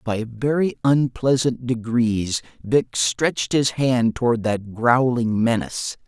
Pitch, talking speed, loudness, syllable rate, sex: 120 Hz, 120 wpm, -21 LUFS, 3.8 syllables/s, male